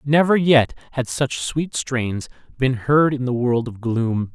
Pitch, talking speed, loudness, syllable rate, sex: 130 Hz, 180 wpm, -20 LUFS, 3.7 syllables/s, male